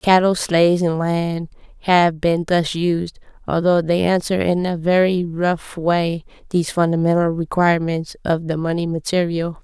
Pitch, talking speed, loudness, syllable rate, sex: 170 Hz, 145 wpm, -19 LUFS, 4.4 syllables/s, female